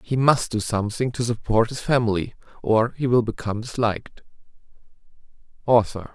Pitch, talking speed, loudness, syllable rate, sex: 115 Hz, 125 wpm, -22 LUFS, 5.8 syllables/s, male